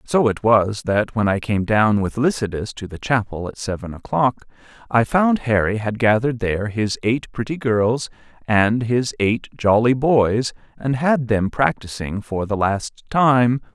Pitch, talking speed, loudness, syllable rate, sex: 115 Hz, 170 wpm, -19 LUFS, 4.2 syllables/s, male